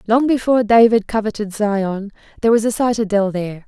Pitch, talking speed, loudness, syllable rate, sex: 215 Hz, 165 wpm, -17 LUFS, 5.9 syllables/s, female